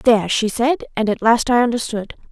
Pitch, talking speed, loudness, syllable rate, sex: 230 Hz, 180 wpm, -18 LUFS, 5.6 syllables/s, female